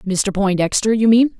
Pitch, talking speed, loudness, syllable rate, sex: 210 Hz, 170 wpm, -16 LUFS, 4.8 syllables/s, female